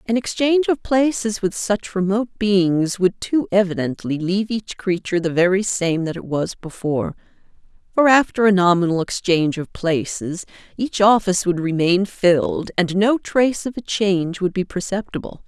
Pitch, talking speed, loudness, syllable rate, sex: 195 Hz, 165 wpm, -19 LUFS, 5.0 syllables/s, female